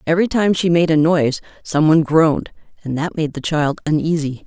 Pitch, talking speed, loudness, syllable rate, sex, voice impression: 160 Hz, 200 wpm, -17 LUFS, 5.8 syllables/s, female, feminine, middle-aged, tensed, powerful, clear, raspy, intellectual, calm, elegant, lively, strict, sharp